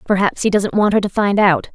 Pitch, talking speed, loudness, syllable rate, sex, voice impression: 200 Hz, 275 wpm, -16 LUFS, 5.7 syllables/s, female, feminine, slightly young, tensed, powerful, hard, clear, fluent, cute, slightly friendly, unique, slightly sweet, lively, slightly sharp